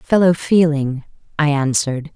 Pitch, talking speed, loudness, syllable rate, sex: 150 Hz, 110 wpm, -17 LUFS, 4.5 syllables/s, female